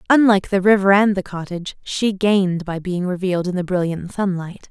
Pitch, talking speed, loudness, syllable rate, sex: 190 Hz, 190 wpm, -19 LUFS, 5.6 syllables/s, female